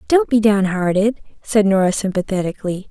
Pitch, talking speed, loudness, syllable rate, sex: 205 Hz, 145 wpm, -17 LUFS, 5.5 syllables/s, female